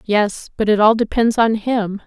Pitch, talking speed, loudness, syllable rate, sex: 220 Hz, 205 wpm, -17 LUFS, 4.2 syllables/s, female